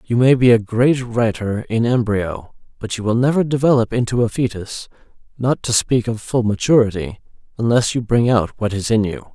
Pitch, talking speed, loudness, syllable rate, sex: 115 Hz, 195 wpm, -18 LUFS, 5.1 syllables/s, male